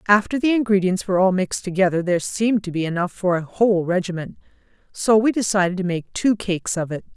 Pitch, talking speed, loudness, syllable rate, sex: 190 Hz, 210 wpm, -20 LUFS, 6.4 syllables/s, female